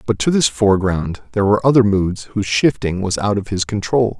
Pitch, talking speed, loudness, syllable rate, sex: 105 Hz, 215 wpm, -17 LUFS, 6.0 syllables/s, male